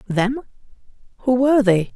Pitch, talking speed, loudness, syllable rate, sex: 235 Hz, 125 wpm, -18 LUFS, 5.4 syllables/s, female